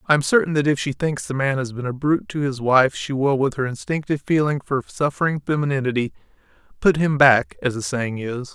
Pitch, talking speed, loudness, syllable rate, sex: 140 Hz, 225 wpm, -21 LUFS, 5.8 syllables/s, male